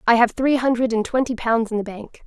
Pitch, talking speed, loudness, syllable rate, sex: 235 Hz, 265 wpm, -20 LUFS, 5.7 syllables/s, female